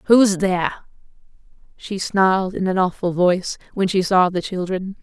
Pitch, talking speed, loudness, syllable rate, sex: 185 Hz, 155 wpm, -19 LUFS, 4.8 syllables/s, female